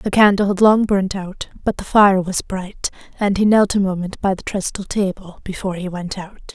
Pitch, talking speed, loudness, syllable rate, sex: 195 Hz, 220 wpm, -18 LUFS, 5.1 syllables/s, female